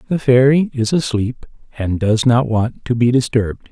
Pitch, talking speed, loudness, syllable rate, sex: 120 Hz, 180 wpm, -16 LUFS, 4.7 syllables/s, male